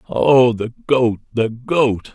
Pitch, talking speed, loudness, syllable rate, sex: 120 Hz, 140 wpm, -17 LUFS, 2.9 syllables/s, male